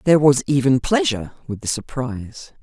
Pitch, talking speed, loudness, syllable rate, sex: 135 Hz, 160 wpm, -19 LUFS, 5.8 syllables/s, female